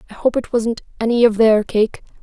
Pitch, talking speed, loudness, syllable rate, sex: 225 Hz, 215 wpm, -17 LUFS, 5.4 syllables/s, female